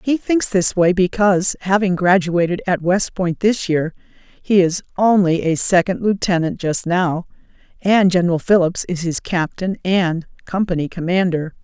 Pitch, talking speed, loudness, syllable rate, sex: 180 Hz, 150 wpm, -17 LUFS, 4.6 syllables/s, female